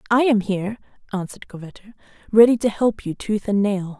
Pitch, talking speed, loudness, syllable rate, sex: 210 Hz, 180 wpm, -20 LUFS, 6.1 syllables/s, female